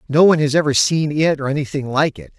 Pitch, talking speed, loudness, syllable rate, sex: 145 Hz, 250 wpm, -17 LUFS, 6.4 syllables/s, male